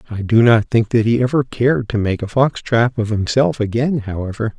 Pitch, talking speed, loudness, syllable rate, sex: 115 Hz, 225 wpm, -17 LUFS, 5.4 syllables/s, male